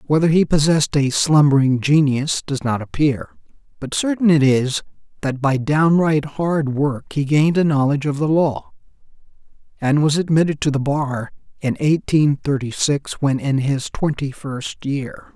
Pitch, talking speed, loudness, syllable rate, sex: 145 Hz, 165 wpm, -18 LUFS, 4.5 syllables/s, male